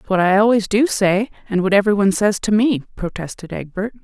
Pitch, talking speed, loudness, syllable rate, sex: 200 Hz, 225 wpm, -17 LUFS, 6.1 syllables/s, female